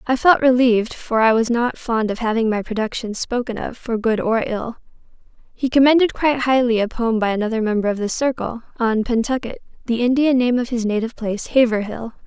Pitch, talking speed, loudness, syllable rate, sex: 235 Hz, 195 wpm, -19 LUFS, 5.7 syllables/s, female